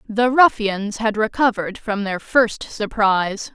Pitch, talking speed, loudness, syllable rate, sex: 215 Hz, 135 wpm, -19 LUFS, 4.1 syllables/s, female